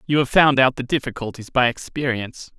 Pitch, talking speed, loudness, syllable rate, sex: 130 Hz, 185 wpm, -19 LUFS, 5.9 syllables/s, male